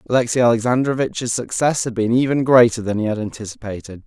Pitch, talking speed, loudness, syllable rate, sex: 115 Hz, 160 wpm, -18 LUFS, 6.2 syllables/s, male